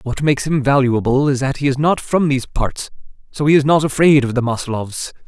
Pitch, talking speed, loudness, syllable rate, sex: 140 Hz, 225 wpm, -16 LUFS, 5.6 syllables/s, male